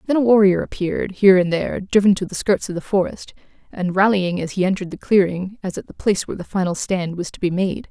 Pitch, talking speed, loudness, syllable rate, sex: 190 Hz, 250 wpm, -19 LUFS, 6.4 syllables/s, female